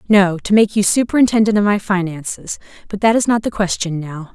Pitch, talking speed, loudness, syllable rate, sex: 200 Hz, 205 wpm, -16 LUFS, 5.7 syllables/s, female